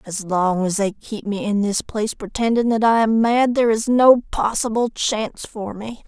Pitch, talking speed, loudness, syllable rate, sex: 215 Hz, 205 wpm, -19 LUFS, 4.8 syllables/s, female